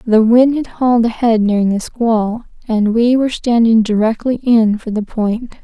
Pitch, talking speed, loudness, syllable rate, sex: 230 Hz, 180 wpm, -14 LUFS, 4.6 syllables/s, female